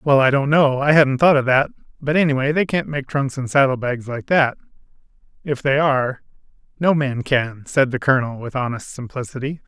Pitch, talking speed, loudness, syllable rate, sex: 135 Hz, 180 wpm, -19 LUFS, 5.4 syllables/s, male